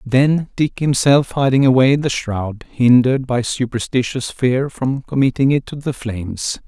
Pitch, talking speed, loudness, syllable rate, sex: 130 Hz, 155 wpm, -17 LUFS, 4.4 syllables/s, male